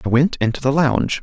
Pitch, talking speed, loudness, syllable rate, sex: 135 Hz, 245 wpm, -18 LUFS, 6.2 syllables/s, male